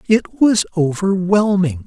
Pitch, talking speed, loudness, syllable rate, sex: 190 Hz, 95 wpm, -16 LUFS, 3.7 syllables/s, male